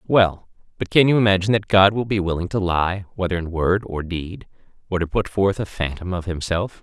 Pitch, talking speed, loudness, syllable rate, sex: 95 Hz, 220 wpm, -20 LUFS, 5.4 syllables/s, male